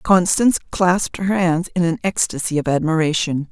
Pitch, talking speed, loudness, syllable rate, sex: 170 Hz, 155 wpm, -18 LUFS, 5.3 syllables/s, female